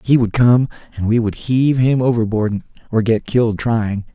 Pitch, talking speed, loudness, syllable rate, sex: 115 Hz, 190 wpm, -17 LUFS, 5.0 syllables/s, male